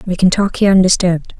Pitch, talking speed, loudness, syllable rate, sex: 185 Hz, 215 wpm, -13 LUFS, 7.3 syllables/s, female